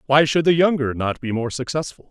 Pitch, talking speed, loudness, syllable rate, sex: 140 Hz, 230 wpm, -20 LUFS, 5.6 syllables/s, male